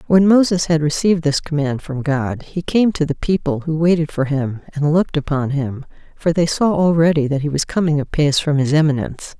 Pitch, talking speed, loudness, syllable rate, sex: 155 Hz, 210 wpm, -17 LUFS, 5.6 syllables/s, female